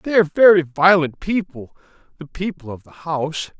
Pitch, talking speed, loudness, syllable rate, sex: 165 Hz, 165 wpm, -17 LUFS, 5.2 syllables/s, male